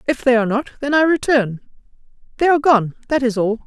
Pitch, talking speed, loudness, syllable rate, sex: 255 Hz, 215 wpm, -17 LUFS, 6.7 syllables/s, female